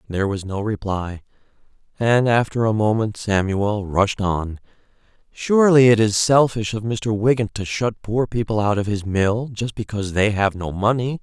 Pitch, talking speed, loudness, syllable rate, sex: 110 Hz, 170 wpm, -20 LUFS, 4.7 syllables/s, male